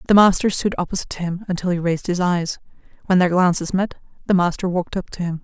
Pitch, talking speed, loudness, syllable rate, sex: 180 Hz, 230 wpm, -20 LUFS, 6.9 syllables/s, female